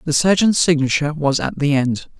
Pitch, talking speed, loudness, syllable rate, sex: 150 Hz, 190 wpm, -17 LUFS, 5.5 syllables/s, male